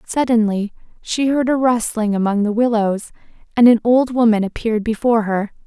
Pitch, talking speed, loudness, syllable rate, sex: 225 Hz, 160 wpm, -17 LUFS, 5.3 syllables/s, female